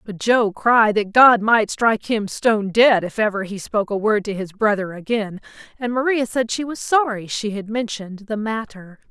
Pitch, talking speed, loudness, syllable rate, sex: 215 Hz, 205 wpm, -19 LUFS, 4.9 syllables/s, female